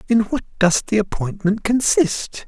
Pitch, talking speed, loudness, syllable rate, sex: 205 Hz, 145 wpm, -19 LUFS, 4.4 syllables/s, male